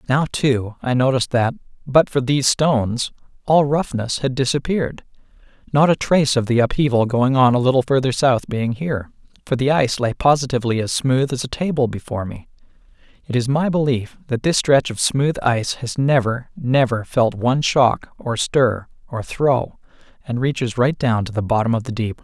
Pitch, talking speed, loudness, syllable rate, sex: 130 Hz, 185 wpm, -19 LUFS, 5.3 syllables/s, male